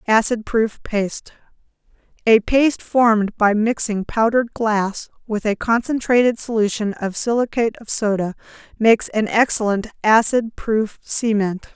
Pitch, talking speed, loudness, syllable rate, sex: 220 Hz, 115 wpm, -19 LUFS, 4.6 syllables/s, female